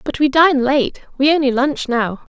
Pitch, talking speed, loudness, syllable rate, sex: 270 Hz, 205 wpm, -16 LUFS, 4.4 syllables/s, female